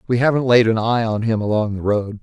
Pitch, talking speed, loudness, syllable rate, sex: 115 Hz, 270 wpm, -18 LUFS, 5.8 syllables/s, male